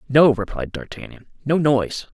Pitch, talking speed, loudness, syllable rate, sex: 135 Hz, 135 wpm, -20 LUFS, 5.0 syllables/s, male